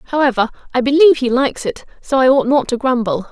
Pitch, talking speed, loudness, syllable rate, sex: 260 Hz, 215 wpm, -15 LUFS, 6.2 syllables/s, female